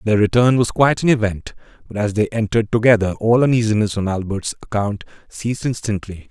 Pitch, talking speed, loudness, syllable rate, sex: 110 Hz, 170 wpm, -18 LUFS, 6.0 syllables/s, male